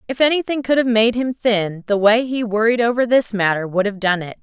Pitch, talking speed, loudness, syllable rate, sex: 225 Hz, 245 wpm, -17 LUFS, 5.5 syllables/s, female